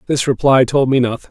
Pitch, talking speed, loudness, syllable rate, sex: 130 Hz, 230 wpm, -14 LUFS, 5.9 syllables/s, male